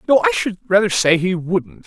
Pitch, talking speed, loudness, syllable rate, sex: 200 Hz, 225 wpm, -17 LUFS, 4.6 syllables/s, male